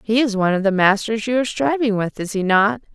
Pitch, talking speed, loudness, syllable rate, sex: 215 Hz, 265 wpm, -18 LUFS, 6.2 syllables/s, female